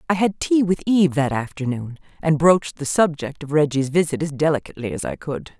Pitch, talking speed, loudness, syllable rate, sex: 155 Hz, 205 wpm, -21 LUFS, 6.0 syllables/s, female